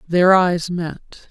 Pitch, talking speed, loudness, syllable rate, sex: 175 Hz, 140 wpm, -17 LUFS, 2.6 syllables/s, female